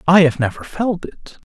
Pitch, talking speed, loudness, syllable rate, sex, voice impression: 170 Hz, 205 wpm, -18 LUFS, 4.8 syllables/s, male, masculine, very adult-like, middle-aged, thick, relaxed, slightly dark, hard, slightly muffled, fluent, slightly raspy, cool, intellectual, very sincere, calm, elegant, kind, slightly modest